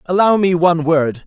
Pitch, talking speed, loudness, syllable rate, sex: 170 Hz, 190 wpm, -14 LUFS, 5.3 syllables/s, male